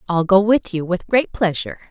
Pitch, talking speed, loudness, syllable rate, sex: 195 Hz, 220 wpm, -18 LUFS, 5.5 syllables/s, female